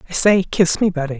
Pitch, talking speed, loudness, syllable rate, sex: 200 Hz, 250 wpm, -16 LUFS, 6.5 syllables/s, female